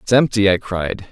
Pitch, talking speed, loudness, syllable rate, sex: 105 Hz, 215 wpm, -17 LUFS, 4.7 syllables/s, male